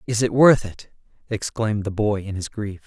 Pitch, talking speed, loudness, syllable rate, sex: 105 Hz, 210 wpm, -21 LUFS, 5.1 syllables/s, male